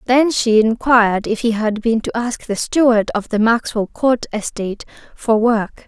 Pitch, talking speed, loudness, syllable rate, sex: 230 Hz, 185 wpm, -17 LUFS, 4.5 syllables/s, female